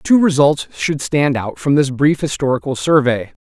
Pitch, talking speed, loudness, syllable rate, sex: 145 Hz, 175 wpm, -16 LUFS, 4.6 syllables/s, male